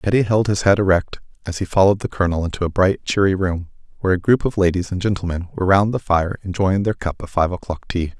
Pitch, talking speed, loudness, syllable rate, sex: 95 Hz, 240 wpm, -19 LUFS, 6.4 syllables/s, male